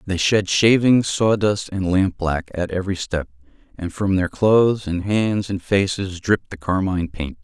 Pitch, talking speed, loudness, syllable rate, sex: 95 Hz, 170 wpm, -20 LUFS, 4.5 syllables/s, male